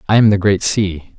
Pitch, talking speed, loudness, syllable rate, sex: 100 Hz, 255 wpm, -15 LUFS, 4.9 syllables/s, male